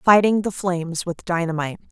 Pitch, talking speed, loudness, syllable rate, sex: 180 Hz, 155 wpm, -21 LUFS, 5.6 syllables/s, female